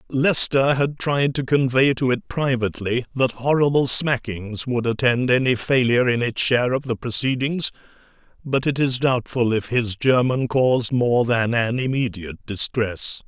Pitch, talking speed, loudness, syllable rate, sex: 125 Hz, 155 wpm, -20 LUFS, 4.6 syllables/s, male